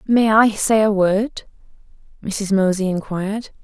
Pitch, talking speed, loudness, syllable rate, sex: 205 Hz, 130 wpm, -18 LUFS, 4.1 syllables/s, female